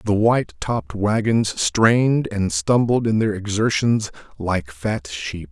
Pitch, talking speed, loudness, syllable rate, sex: 105 Hz, 140 wpm, -20 LUFS, 4.0 syllables/s, male